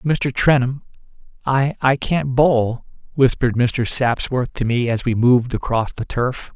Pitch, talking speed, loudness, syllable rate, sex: 125 Hz, 145 wpm, -19 LUFS, 4.2 syllables/s, male